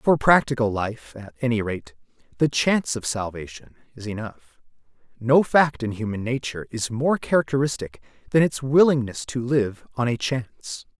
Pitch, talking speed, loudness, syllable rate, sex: 125 Hz, 155 wpm, -23 LUFS, 5.1 syllables/s, male